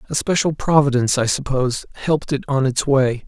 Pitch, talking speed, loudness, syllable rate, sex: 135 Hz, 185 wpm, -19 LUFS, 5.8 syllables/s, male